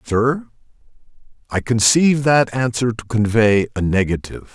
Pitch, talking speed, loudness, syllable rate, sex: 115 Hz, 120 wpm, -17 LUFS, 4.8 syllables/s, male